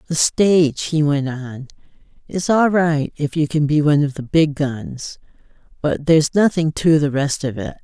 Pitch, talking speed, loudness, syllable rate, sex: 150 Hz, 190 wpm, -18 LUFS, 4.6 syllables/s, female